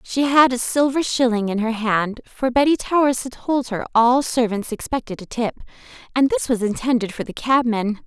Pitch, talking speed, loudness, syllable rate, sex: 245 Hz, 195 wpm, -20 LUFS, 5.1 syllables/s, female